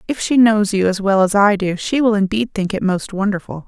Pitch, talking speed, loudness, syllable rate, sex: 205 Hz, 260 wpm, -16 LUFS, 5.4 syllables/s, female